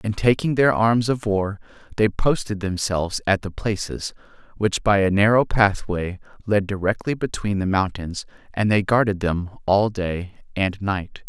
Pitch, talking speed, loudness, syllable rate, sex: 100 Hz, 160 wpm, -22 LUFS, 4.5 syllables/s, male